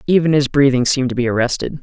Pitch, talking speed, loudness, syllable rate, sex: 135 Hz, 230 wpm, -16 LUFS, 7.2 syllables/s, male